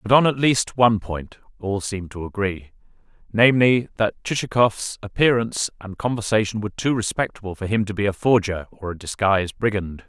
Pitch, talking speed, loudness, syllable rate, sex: 105 Hz, 165 wpm, -21 LUFS, 5.7 syllables/s, male